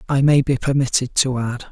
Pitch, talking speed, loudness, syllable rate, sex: 130 Hz, 210 wpm, -18 LUFS, 5.3 syllables/s, male